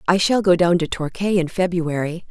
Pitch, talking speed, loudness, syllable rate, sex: 175 Hz, 210 wpm, -19 LUFS, 5.2 syllables/s, female